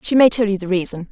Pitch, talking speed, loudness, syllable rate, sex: 205 Hz, 325 wpm, -17 LUFS, 6.9 syllables/s, female